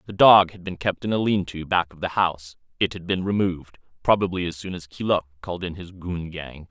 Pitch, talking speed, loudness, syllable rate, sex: 90 Hz, 240 wpm, -23 LUFS, 5.7 syllables/s, male